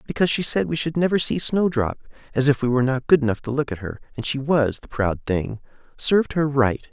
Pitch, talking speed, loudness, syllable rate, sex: 135 Hz, 235 wpm, -22 LUFS, 6.0 syllables/s, male